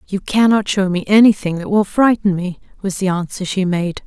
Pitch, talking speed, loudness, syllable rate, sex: 195 Hz, 205 wpm, -16 LUFS, 5.1 syllables/s, female